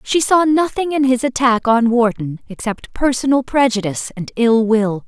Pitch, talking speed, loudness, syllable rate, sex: 245 Hz, 165 wpm, -16 LUFS, 4.7 syllables/s, female